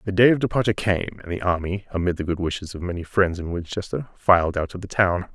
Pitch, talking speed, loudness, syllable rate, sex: 95 Hz, 245 wpm, -23 LUFS, 6.5 syllables/s, male